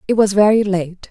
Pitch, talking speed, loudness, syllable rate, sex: 200 Hz, 220 wpm, -15 LUFS, 5.3 syllables/s, female